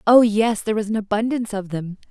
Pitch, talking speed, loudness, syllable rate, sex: 215 Hz, 230 wpm, -20 LUFS, 6.5 syllables/s, female